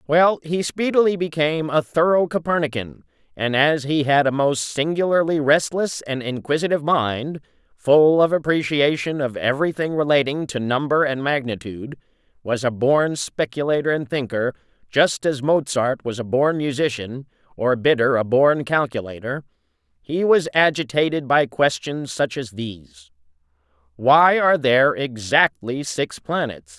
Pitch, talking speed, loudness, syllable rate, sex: 140 Hz, 130 wpm, -20 LUFS, 4.6 syllables/s, male